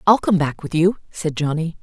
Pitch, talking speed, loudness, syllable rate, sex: 165 Hz, 230 wpm, -20 LUFS, 5.2 syllables/s, female